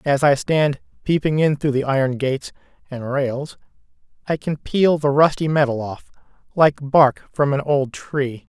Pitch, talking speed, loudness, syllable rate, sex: 140 Hz, 170 wpm, -19 LUFS, 4.4 syllables/s, male